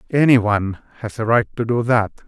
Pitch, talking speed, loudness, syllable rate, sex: 115 Hz, 210 wpm, -18 LUFS, 6.0 syllables/s, male